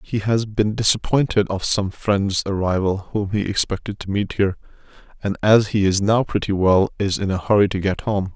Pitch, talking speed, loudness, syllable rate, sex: 100 Hz, 200 wpm, -20 LUFS, 5.1 syllables/s, male